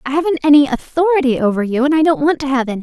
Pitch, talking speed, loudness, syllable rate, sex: 280 Hz, 275 wpm, -14 LUFS, 7.3 syllables/s, female